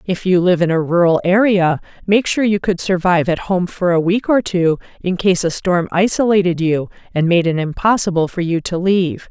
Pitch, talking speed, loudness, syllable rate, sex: 180 Hz, 215 wpm, -16 LUFS, 5.2 syllables/s, female